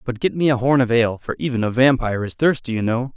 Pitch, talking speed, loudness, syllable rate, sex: 125 Hz, 285 wpm, -19 LUFS, 6.6 syllables/s, male